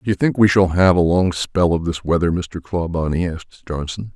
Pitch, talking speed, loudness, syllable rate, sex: 90 Hz, 230 wpm, -18 LUFS, 5.2 syllables/s, male